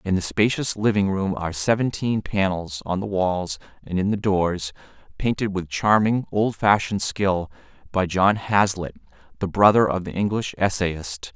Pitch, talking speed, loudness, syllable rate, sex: 95 Hz, 155 wpm, -22 LUFS, 4.6 syllables/s, male